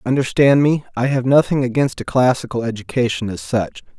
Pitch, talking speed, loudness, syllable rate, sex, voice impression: 125 Hz, 150 wpm, -17 LUFS, 5.5 syllables/s, male, masculine, adult-like, thick, tensed, powerful, slightly hard, clear, slightly nasal, cool, intellectual, slightly mature, wild, lively